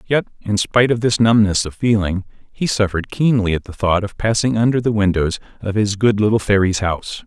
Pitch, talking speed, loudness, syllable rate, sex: 105 Hz, 205 wpm, -17 LUFS, 5.8 syllables/s, male